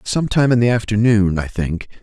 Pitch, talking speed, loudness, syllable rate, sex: 110 Hz, 210 wpm, -17 LUFS, 5.0 syllables/s, male